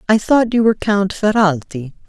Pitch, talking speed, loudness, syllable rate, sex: 200 Hz, 175 wpm, -15 LUFS, 5.1 syllables/s, female